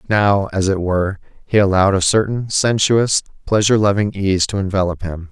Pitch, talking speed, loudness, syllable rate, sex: 100 Hz, 170 wpm, -16 LUFS, 5.4 syllables/s, male